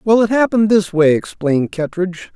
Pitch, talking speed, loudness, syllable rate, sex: 185 Hz, 180 wpm, -15 LUFS, 6.0 syllables/s, male